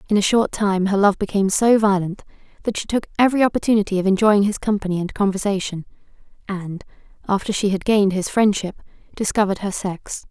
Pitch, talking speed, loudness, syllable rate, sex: 200 Hz, 175 wpm, -19 LUFS, 6.2 syllables/s, female